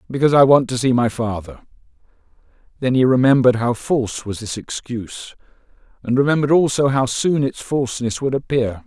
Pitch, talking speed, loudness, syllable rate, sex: 125 Hz, 160 wpm, -18 LUFS, 5.9 syllables/s, male